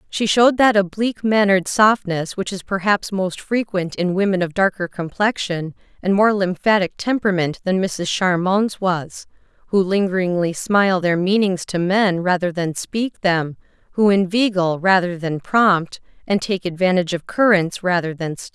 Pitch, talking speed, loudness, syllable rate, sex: 190 Hz, 155 wpm, -19 LUFS, 4.7 syllables/s, female